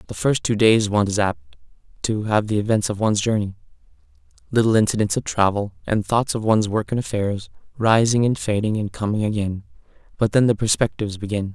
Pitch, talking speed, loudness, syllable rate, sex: 105 Hz, 185 wpm, -21 LUFS, 6.0 syllables/s, male